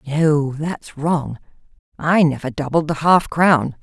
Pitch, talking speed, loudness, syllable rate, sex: 150 Hz, 125 wpm, -18 LUFS, 3.6 syllables/s, female